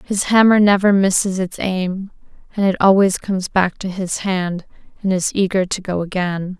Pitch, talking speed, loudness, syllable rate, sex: 190 Hz, 180 wpm, -17 LUFS, 4.8 syllables/s, female